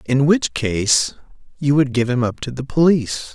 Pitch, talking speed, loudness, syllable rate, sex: 135 Hz, 195 wpm, -18 LUFS, 4.6 syllables/s, male